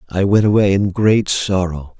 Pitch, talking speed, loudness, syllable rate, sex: 95 Hz, 180 wpm, -15 LUFS, 4.5 syllables/s, male